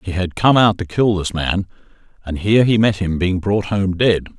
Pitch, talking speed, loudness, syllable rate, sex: 95 Hz, 235 wpm, -17 LUFS, 5.0 syllables/s, male